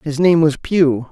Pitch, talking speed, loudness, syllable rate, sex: 155 Hz, 215 wpm, -15 LUFS, 4.0 syllables/s, male